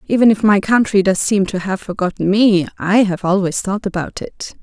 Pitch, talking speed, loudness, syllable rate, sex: 200 Hz, 205 wpm, -16 LUFS, 5.1 syllables/s, female